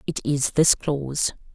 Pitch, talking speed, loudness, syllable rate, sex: 145 Hz, 155 wpm, -22 LUFS, 4.1 syllables/s, female